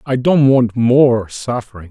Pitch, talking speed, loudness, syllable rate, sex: 125 Hz, 160 wpm, -14 LUFS, 3.9 syllables/s, male